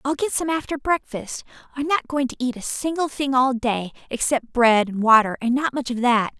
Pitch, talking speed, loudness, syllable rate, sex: 260 Hz, 215 wpm, -21 LUFS, 5.1 syllables/s, female